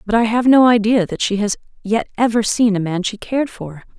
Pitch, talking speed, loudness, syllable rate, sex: 220 Hz, 240 wpm, -17 LUFS, 5.6 syllables/s, female